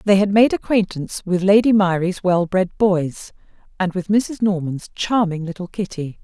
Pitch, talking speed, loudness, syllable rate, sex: 190 Hz, 165 wpm, -19 LUFS, 4.7 syllables/s, female